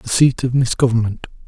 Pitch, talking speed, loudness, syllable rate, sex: 125 Hz, 160 wpm, -17 LUFS, 5.6 syllables/s, male